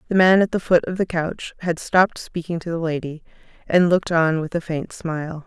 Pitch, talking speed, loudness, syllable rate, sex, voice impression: 170 Hz, 230 wpm, -21 LUFS, 5.5 syllables/s, female, feminine, slightly young, tensed, clear, fluent, intellectual, calm, sharp